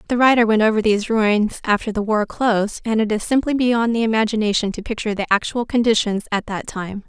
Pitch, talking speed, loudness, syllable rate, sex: 220 Hz, 210 wpm, -19 LUFS, 6.0 syllables/s, female